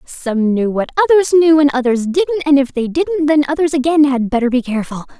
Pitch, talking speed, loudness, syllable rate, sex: 285 Hz, 220 wpm, -14 LUFS, 5.6 syllables/s, female